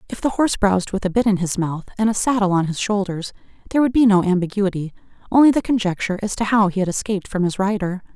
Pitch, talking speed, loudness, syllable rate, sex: 200 Hz, 235 wpm, -19 LUFS, 7.0 syllables/s, female